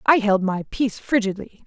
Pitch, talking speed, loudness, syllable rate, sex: 215 Hz, 180 wpm, -21 LUFS, 5.4 syllables/s, female